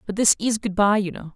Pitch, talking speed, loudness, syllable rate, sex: 200 Hz, 310 wpm, -21 LUFS, 5.9 syllables/s, female